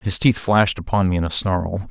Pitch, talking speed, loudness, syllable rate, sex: 95 Hz, 250 wpm, -19 LUFS, 5.4 syllables/s, male